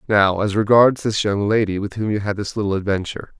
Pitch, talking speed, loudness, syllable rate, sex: 105 Hz, 230 wpm, -19 LUFS, 6.0 syllables/s, male